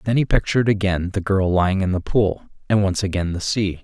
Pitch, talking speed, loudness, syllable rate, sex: 95 Hz, 235 wpm, -20 LUFS, 5.9 syllables/s, male